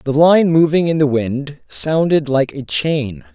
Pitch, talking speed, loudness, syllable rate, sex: 140 Hz, 180 wpm, -16 LUFS, 3.9 syllables/s, male